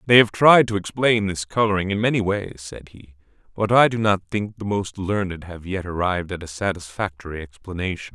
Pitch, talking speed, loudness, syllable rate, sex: 95 Hz, 200 wpm, -21 LUFS, 5.5 syllables/s, male